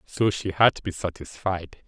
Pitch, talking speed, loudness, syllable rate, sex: 95 Hz, 190 wpm, -25 LUFS, 4.6 syllables/s, male